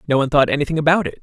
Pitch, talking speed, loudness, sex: 150 Hz, 295 wpm, -17 LUFS, male